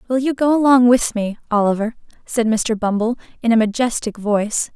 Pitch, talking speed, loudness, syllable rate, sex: 230 Hz, 175 wpm, -18 LUFS, 5.4 syllables/s, female